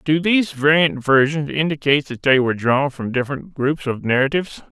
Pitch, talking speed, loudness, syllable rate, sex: 140 Hz, 175 wpm, -18 LUFS, 5.7 syllables/s, male